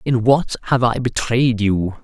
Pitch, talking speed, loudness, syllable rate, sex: 120 Hz, 175 wpm, -18 LUFS, 3.9 syllables/s, male